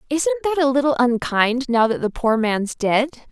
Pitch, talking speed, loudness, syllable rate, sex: 260 Hz, 200 wpm, -19 LUFS, 4.9 syllables/s, female